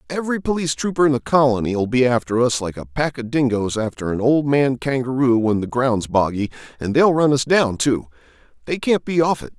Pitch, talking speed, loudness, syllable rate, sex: 130 Hz, 215 wpm, -19 LUFS, 5.6 syllables/s, male